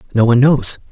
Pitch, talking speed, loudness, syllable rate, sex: 125 Hz, 195 wpm, -13 LUFS, 7.4 syllables/s, male